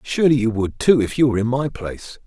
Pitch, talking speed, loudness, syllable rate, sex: 125 Hz, 265 wpm, -18 LUFS, 6.6 syllables/s, male